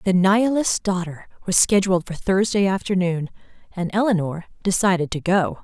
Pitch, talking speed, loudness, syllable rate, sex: 185 Hz, 140 wpm, -20 LUFS, 5.3 syllables/s, female